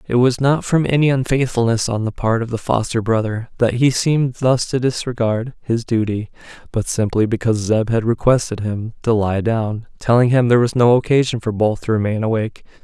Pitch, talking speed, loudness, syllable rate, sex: 115 Hz, 190 wpm, -18 LUFS, 5.4 syllables/s, male